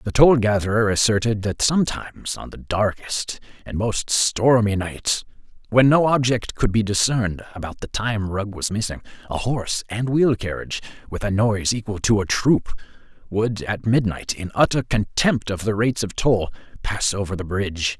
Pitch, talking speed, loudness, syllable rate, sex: 110 Hz, 170 wpm, -21 LUFS, 5.0 syllables/s, male